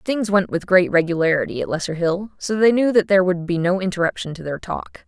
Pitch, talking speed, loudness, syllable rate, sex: 185 Hz, 235 wpm, -19 LUFS, 5.8 syllables/s, female